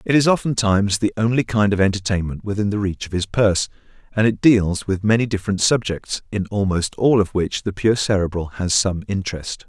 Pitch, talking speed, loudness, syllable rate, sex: 100 Hz, 200 wpm, -20 LUFS, 5.6 syllables/s, male